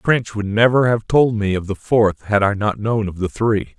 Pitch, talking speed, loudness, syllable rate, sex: 105 Hz, 255 wpm, -18 LUFS, 4.6 syllables/s, male